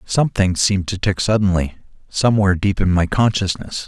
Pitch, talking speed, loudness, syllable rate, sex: 95 Hz, 155 wpm, -18 LUFS, 5.8 syllables/s, male